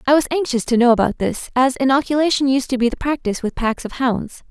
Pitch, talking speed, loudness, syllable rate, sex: 255 Hz, 240 wpm, -18 LUFS, 6.1 syllables/s, female